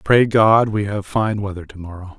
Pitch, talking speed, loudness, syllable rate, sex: 105 Hz, 220 wpm, -17 LUFS, 4.8 syllables/s, male